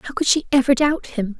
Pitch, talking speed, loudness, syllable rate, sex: 265 Hz, 260 wpm, -19 LUFS, 5.4 syllables/s, female